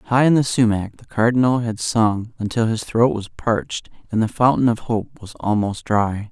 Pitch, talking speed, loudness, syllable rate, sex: 115 Hz, 200 wpm, -20 LUFS, 4.8 syllables/s, male